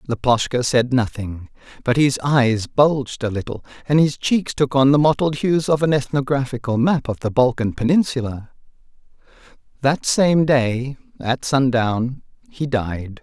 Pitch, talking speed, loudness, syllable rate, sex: 130 Hz, 145 wpm, -19 LUFS, 4.4 syllables/s, male